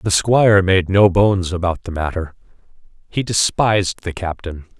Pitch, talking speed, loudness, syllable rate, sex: 95 Hz, 150 wpm, -17 LUFS, 4.8 syllables/s, male